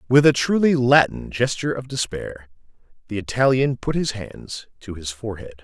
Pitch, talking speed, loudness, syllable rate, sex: 120 Hz, 160 wpm, -21 LUFS, 5.1 syllables/s, male